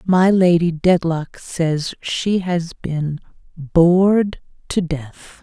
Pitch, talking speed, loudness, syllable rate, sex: 170 Hz, 110 wpm, -18 LUFS, 2.8 syllables/s, female